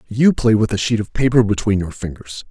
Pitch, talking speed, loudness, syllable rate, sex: 110 Hz, 240 wpm, -17 LUFS, 5.6 syllables/s, male